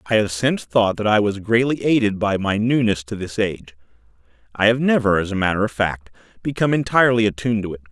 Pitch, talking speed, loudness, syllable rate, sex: 105 Hz, 210 wpm, -19 LUFS, 6.3 syllables/s, male